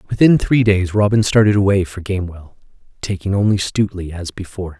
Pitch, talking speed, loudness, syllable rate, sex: 95 Hz, 165 wpm, -17 LUFS, 6.1 syllables/s, male